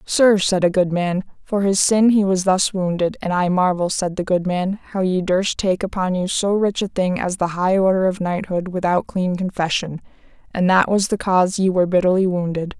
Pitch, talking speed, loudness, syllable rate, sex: 185 Hz, 220 wpm, -19 LUFS, 5.0 syllables/s, female